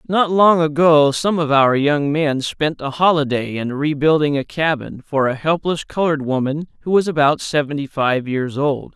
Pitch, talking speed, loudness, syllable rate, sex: 150 Hz, 180 wpm, -17 LUFS, 4.6 syllables/s, male